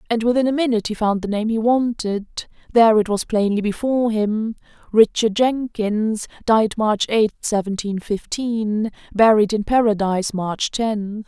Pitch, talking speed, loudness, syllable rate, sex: 220 Hz, 140 wpm, -19 LUFS, 4.6 syllables/s, female